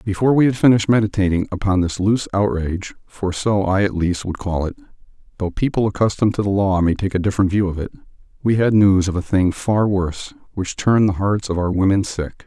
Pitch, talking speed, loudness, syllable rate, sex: 100 Hz, 210 wpm, -19 LUFS, 6.1 syllables/s, male